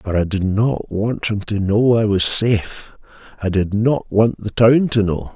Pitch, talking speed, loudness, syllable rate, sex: 105 Hz, 200 wpm, -17 LUFS, 4.2 syllables/s, male